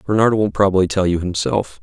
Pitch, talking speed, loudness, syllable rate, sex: 100 Hz, 195 wpm, -17 LUFS, 5.9 syllables/s, male